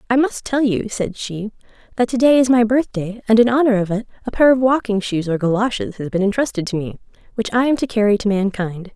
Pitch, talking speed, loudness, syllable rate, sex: 220 Hz, 240 wpm, -18 LUFS, 5.9 syllables/s, female